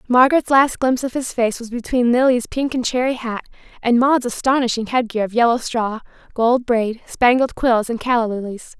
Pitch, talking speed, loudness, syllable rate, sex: 240 Hz, 185 wpm, -18 LUFS, 5.3 syllables/s, female